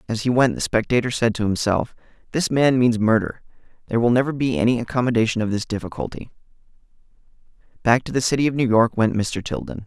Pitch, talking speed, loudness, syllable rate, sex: 120 Hz, 190 wpm, -20 LUFS, 6.4 syllables/s, male